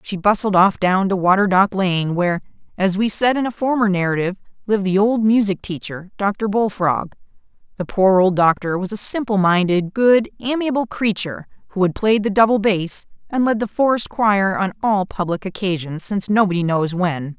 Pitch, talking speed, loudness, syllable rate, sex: 195 Hz, 185 wpm, -18 LUFS, 5.2 syllables/s, female